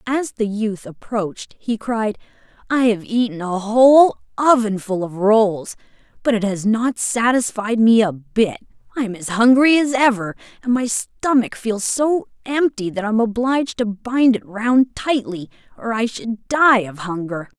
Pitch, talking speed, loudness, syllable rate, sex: 225 Hz, 165 wpm, -18 LUFS, 4.3 syllables/s, female